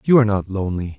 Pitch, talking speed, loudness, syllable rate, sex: 105 Hz, 245 wpm, -19 LUFS, 7.9 syllables/s, male